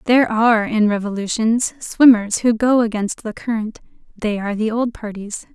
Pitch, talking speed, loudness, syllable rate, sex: 225 Hz, 160 wpm, -18 LUFS, 5.1 syllables/s, female